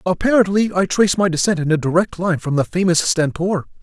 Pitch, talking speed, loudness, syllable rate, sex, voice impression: 175 Hz, 205 wpm, -17 LUFS, 5.9 syllables/s, male, masculine, adult-like, slightly muffled, fluent, slightly cool, slightly unique, slightly intense